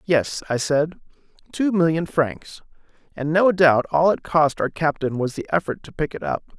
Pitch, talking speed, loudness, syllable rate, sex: 155 Hz, 190 wpm, -21 LUFS, 4.7 syllables/s, male